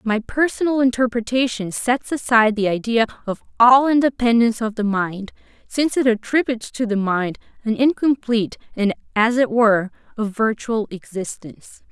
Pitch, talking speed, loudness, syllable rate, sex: 230 Hz, 140 wpm, -19 LUFS, 5.2 syllables/s, female